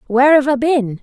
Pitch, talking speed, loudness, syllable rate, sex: 265 Hz, 235 wpm, -13 LUFS, 5.8 syllables/s, female